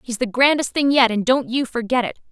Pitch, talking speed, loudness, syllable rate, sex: 245 Hz, 260 wpm, -18 LUFS, 5.8 syllables/s, female